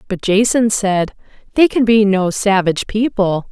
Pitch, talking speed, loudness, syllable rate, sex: 205 Hz, 155 wpm, -15 LUFS, 4.6 syllables/s, female